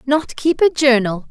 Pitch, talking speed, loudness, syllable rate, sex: 270 Hz, 185 wpm, -16 LUFS, 4.1 syllables/s, female